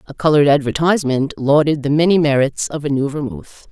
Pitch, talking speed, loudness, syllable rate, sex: 145 Hz, 180 wpm, -16 LUFS, 6.0 syllables/s, female